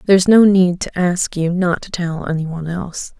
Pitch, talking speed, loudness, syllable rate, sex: 175 Hz, 205 wpm, -16 LUFS, 5.0 syllables/s, female